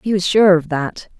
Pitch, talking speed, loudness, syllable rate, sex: 180 Hz, 250 wpm, -15 LUFS, 4.6 syllables/s, female